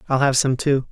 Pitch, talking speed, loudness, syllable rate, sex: 135 Hz, 265 wpm, -19 LUFS, 5.5 syllables/s, male